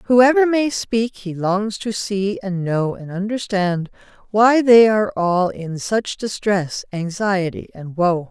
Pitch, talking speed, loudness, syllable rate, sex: 205 Hz, 150 wpm, -19 LUFS, 3.6 syllables/s, female